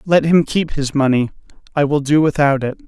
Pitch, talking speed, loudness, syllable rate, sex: 145 Hz, 210 wpm, -16 LUFS, 5.4 syllables/s, male